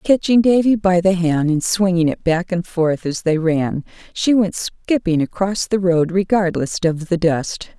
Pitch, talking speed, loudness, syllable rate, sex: 180 Hz, 185 wpm, -17 LUFS, 4.4 syllables/s, female